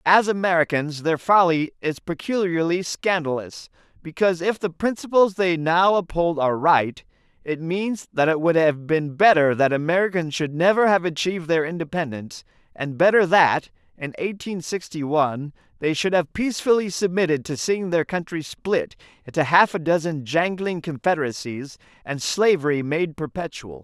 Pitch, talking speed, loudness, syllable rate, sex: 165 Hz, 150 wpm, -21 LUFS, 4.9 syllables/s, male